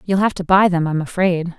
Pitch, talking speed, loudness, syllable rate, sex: 180 Hz, 265 wpm, -17 LUFS, 5.4 syllables/s, female